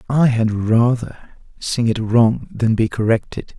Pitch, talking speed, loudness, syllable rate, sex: 115 Hz, 150 wpm, -17 LUFS, 3.8 syllables/s, male